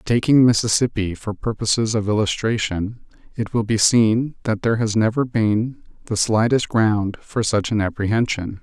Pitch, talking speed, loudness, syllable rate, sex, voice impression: 110 Hz, 155 wpm, -20 LUFS, 4.7 syllables/s, male, very masculine, very adult-like, very middle-aged, very thick, tensed, very powerful, slightly dark, slightly hard, slightly muffled, fluent, slightly raspy, very cool, intellectual, very sincere, very calm, very mature, very friendly, very reassuring, unique, very elegant, slightly wild, very sweet, slightly lively, very kind, modest